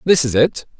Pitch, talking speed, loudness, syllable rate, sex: 145 Hz, 225 wpm, -16 LUFS, 5.4 syllables/s, male